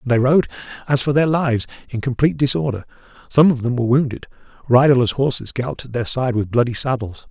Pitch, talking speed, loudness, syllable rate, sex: 125 Hz, 190 wpm, -18 LUFS, 6.5 syllables/s, male